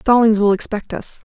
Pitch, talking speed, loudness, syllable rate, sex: 215 Hz, 180 wpm, -17 LUFS, 5.0 syllables/s, female